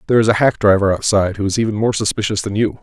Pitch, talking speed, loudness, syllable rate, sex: 105 Hz, 275 wpm, -16 LUFS, 7.6 syllables/s, male